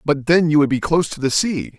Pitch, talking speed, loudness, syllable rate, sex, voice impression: 150 Hz, 300 wpm, -17 LUFS, 6.0 syllables/s, male, masculine, adult-like, thick, tensed, powerful, slightly hard, clear, cool, intellectual, slightly mature, friendly, slightly reassuring, wild, lively, slightly intense